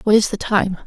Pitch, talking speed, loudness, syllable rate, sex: 205 Hz, 275 wpm, -18 LUFS, 5.7 syllables/s, female